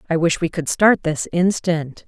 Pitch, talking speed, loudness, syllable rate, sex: 170 Hz, 200 wpm, -19 LUFS, 4.3 syllables/s, female